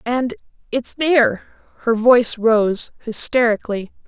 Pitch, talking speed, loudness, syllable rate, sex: 235 Hz, 105 wpm, -18 LUFS, 4.2 syllables/s, female